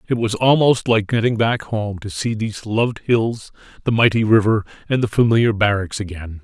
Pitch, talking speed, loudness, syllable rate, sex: 110 Hz, 185 wpm, -18 LUFS, 5.3 syllables/s, male